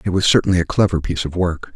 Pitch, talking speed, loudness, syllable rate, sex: 90 Hz, 275 wpm, -18 LUFS, 7.3 syllables/s, male